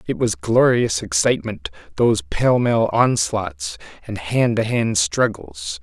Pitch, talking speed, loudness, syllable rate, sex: 115 Hz, 135 wpm, -19 LUFS, 3.9 syllables/s, male